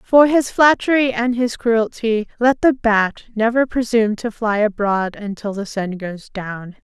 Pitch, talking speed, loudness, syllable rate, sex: 225 Hz, 185 wpm, -18 LUFS, 4.5 syllables/s, female